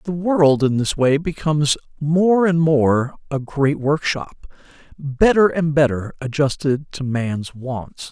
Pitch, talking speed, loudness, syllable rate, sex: 145 Hz, 140 wpm, -19 LUFS, 3.7 syllables/s, male